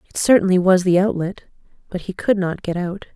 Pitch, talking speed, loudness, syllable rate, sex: 185 Hz, 210 wpm, -18 LUFS, 5.7 syllables/s, female